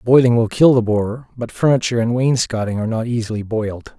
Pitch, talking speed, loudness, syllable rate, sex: 115 Hz, 195 wpm, -17 LUFS, 6.3 syllables/s, male